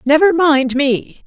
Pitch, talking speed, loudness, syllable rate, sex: 290 Hz, 140 wpm, -14 LUFS, 3.5 syllables/s, female